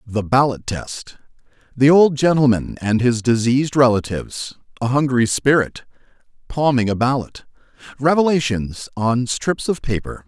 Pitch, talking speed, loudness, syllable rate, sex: 130 Hz, 100 wpm, -18 LUFS, 4.6 syllables/s, male